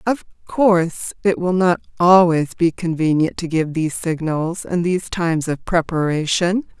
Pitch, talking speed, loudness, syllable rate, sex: 170 Hz, 150 wpm, -18 LUFS, 4.6 syllables/s, female